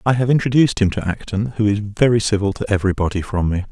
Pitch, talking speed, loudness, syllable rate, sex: 105 Hz, 240 wpm, -18 LUFS, 6.8 syllables/s, male